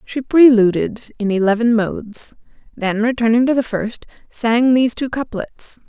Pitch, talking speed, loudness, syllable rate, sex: 230 Hz, 145 wpm, -17 LUFS, 4.5 syllables/s, female